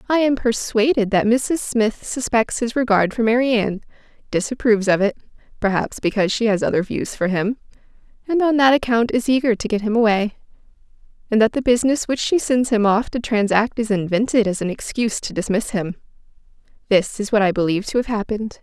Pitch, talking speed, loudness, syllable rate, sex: 225 Hz, 185 wpm, -19 LUFS, 5.2 syllables/s, female